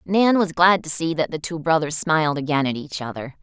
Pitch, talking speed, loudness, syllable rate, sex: 160 Hz, 245 wpm, -21 LUFS, 5.4 syllables/s, female